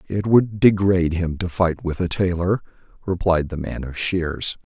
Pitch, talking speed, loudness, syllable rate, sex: 90 Hz, 175 wpm, -21 LUFS, 4.5 syllables/s, male